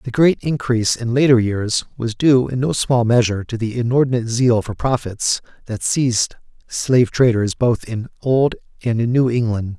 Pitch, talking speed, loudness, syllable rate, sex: 120 Hz, 180 wpm, -18 LUFS, 5.0 syllables/s, male